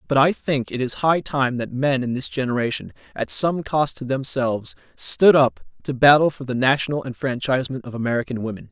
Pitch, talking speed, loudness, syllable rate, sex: 135 Hz, 195 wpm, -21 LUFS, 5.5 syllables/s, male